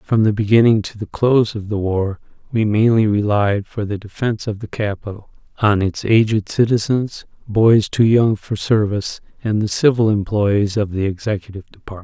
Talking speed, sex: 175 wpm, male